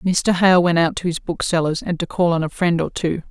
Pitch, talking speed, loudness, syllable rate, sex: 170 Hz, 270 wpm, -19 LUFS, 5.3 syllables/s, female